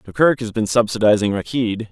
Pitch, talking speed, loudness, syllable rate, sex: 110 Hz, 155 wpm, -18 LUFS, 5.5 syllables/s, male